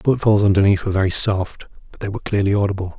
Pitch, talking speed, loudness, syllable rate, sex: 100 Hz, 220 wpm, -18 LUFS, 7.3 syllables/s, male